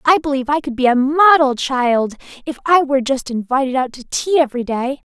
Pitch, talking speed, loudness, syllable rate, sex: 270 Hz, 210 wpm, -16 LUFS, 5.7 syllables/s, female